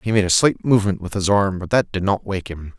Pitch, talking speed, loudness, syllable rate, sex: 100 Hz, 300 wpm, -19 LUFS, 5.9 syllables/s, male